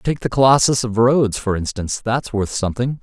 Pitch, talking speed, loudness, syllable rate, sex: 115 Hz, 200 wpm, -18 LUFS, 5.8 syllables/s, male